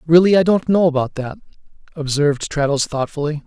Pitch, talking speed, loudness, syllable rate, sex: 155 Hz, 155 wpm, -17 LUFS, 5.8 syllables/s, male